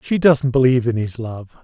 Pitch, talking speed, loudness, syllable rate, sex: 125 Hz, 220 wpm, -17 LUFS, 5.3 syllables/s, male